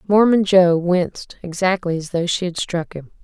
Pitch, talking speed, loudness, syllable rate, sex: 180 Hz, 185 wpm, -18 LUFS, 4.8 syllables/s, female